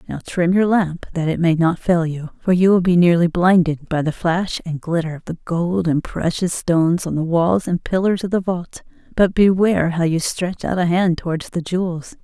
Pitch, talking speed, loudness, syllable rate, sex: 175 Hz, 225 wpm, -18 LUFS, 5.0 syllables/s, female